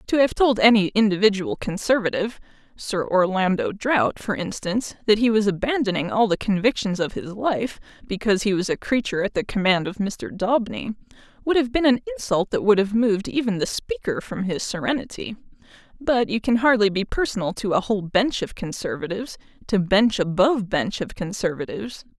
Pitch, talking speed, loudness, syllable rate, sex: 210 Hz, 170 wpm, -22 LUFS, 5.7 syllables/s, female